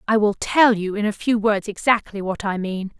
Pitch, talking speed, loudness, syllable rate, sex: 210 Hz, 240 wpm, -20 LUFS, 5.0 syllables/s, female